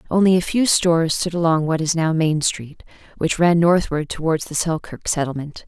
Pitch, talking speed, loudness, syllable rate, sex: 165 Hz, 190 wpm, -19 LUFS, 5.1 syllables/s, female